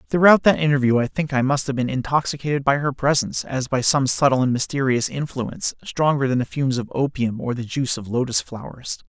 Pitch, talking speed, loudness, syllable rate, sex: 135 Hz, 210 wpm, -21 LUFS, 5.9 syllables/s, male